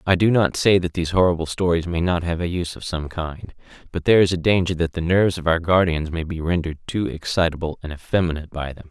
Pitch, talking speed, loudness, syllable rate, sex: 85 Hz, 245 wpm, -21 LUFS, 6.5 syllables/s, male